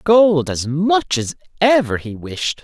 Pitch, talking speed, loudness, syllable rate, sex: 165 Hz, 160 wpm, -17 LUFS, 3.5 syllables/s, male